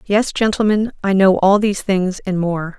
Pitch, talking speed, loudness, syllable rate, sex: 195 Hz, 195 wpm, -16 LUFS, 4.6 syllables/s, female